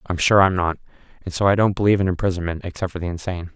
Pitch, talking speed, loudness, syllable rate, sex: 90 Hz, 235 wpm, -20 LUFS, 7.7 syllables/s, male